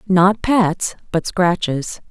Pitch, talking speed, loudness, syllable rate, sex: 185 Hz, 115 wpm, -18 LUFS, 2.9 syllables/s, female